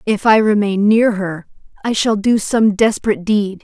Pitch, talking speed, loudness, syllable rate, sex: 210 Hz, 180 wpm, -15 LUFS, 4.8 syllables/s, female